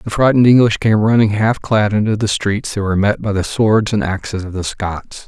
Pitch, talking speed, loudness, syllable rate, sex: 105 Hz, 250 wpm, -15 LUFS, 5.5 syllables/s, male